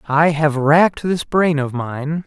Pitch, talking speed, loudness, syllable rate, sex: 150 Hz, 185 wpm, -17 LUFS, 3.8 syllables/s, male